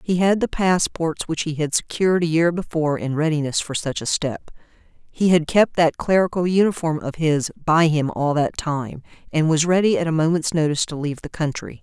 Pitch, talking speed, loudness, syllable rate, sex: 160 Hz, 210 wpm, -20 LUFS, 4.3 syllables/s, female